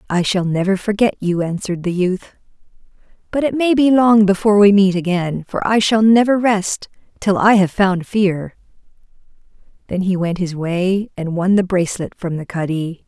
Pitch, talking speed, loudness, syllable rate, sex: 190 Hz, 180 wpm, -16 LUFS, 4.9 syllables/s, female